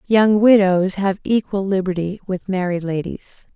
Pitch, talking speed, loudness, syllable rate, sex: 195 Hz, 135 wpm, -18 LUFS, 4.3 syllables/s, female